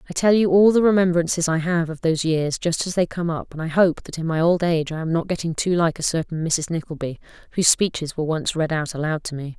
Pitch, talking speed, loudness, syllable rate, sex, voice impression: 165 Hz, 270 wpm, -21 LUFS, 6.2 syllables/s, female, feminine, adult-like, fluent, calm